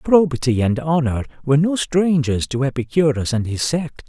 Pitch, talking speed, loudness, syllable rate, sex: 140 Hz, 160 wpm, -19 LUFS, 5.0 syllables/s, male